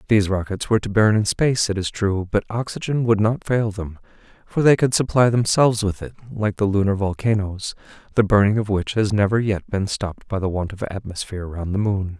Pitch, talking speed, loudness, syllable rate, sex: 105 Hz, 215 wpm, -21 LUFS, 5.7 syllables/s, male